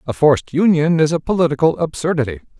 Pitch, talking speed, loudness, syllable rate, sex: 150 Hz, 160 wpm, -16 LUFS, 6.6 syllables/s, male